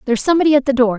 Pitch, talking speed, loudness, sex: 265 Hz, 305 wpm, -14 LUFS, female